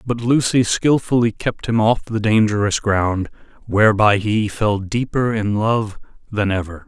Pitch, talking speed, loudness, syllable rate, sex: 110 Hz, 150 wpm, -18 LUFS, 4.3 syllables/s, male